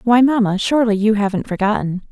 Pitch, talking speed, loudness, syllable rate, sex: 215 Hz, 170 wpm, -16 LUFS, 6.0 syllables/s, female